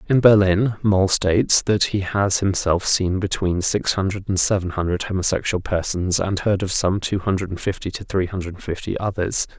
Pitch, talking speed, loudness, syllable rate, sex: 95 Hz, 180 wpm, -20 LUFS, 4.9 syllables/s, male